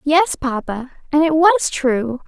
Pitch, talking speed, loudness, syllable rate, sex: 285 Hz, 160 wpm, -17 LUFS, 3.6 syllables/s, female